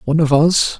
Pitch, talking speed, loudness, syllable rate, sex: 155 Hz, 225 wpm, -14 LUFS, 6.0 syllables/s, male